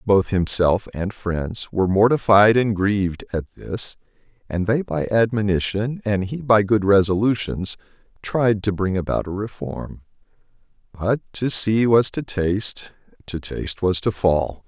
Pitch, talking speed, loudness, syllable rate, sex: 100 Hz, 145 wpm, -20 LUFS, 4.3 syllables/s, male